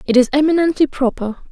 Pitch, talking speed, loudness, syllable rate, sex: 280 Hz, 160 wpm, -16 LUFS, 6.3 syllables/s, female